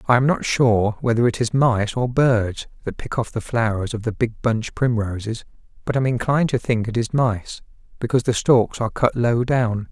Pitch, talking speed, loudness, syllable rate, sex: 115 Hz, 210 wpm, -20 LUFS, 5.0 syllables/s, male